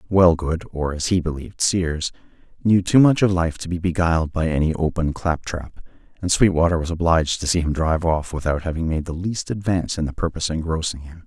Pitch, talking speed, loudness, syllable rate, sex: 85 Hz, 210 wpm, -21 LUFS, 5.8 syllables/s, male